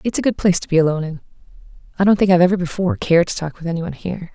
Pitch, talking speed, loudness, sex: 175 Hz, 275 wpm, -18 LUFS, female